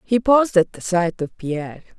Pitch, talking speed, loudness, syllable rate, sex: 195 Hz, 210 wpm, -19 LUFS, 5.1 syllables/s, female